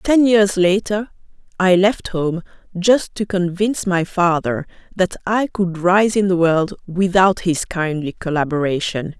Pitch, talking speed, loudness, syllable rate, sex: 185 Hz, 145 wpm, -18 LUFS, 4.0 syllables/s, female